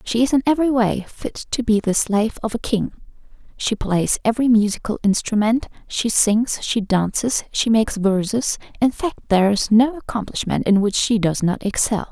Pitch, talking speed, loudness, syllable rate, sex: 220 Hz, 185 wpm, -19 LUFS, 5.1 syllables/s, female